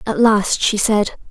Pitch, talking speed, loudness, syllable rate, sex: 210 Hz, 185 wpm, -16 LUFS, 3.9 syllables/s, female